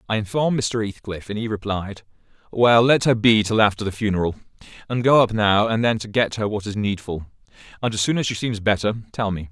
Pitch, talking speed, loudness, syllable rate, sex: 110 Hz, 220 wpm, -21 LUFS, 5.9 syllables/s, male